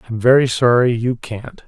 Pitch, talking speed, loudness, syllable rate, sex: 120 Hz, 215 wpm, -15 LUFS, 5.2 syllables/s, male